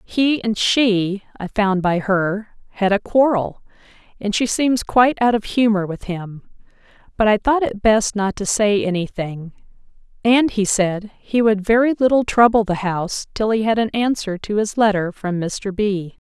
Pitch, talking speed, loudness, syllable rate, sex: 210 Hz, 185 wpm, -18 LUFS, 4.4 syllables/s, female